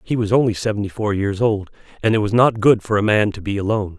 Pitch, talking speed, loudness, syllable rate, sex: 105 Hz, 270 wpm, -18 LUFS, 6.4 syllables/s, male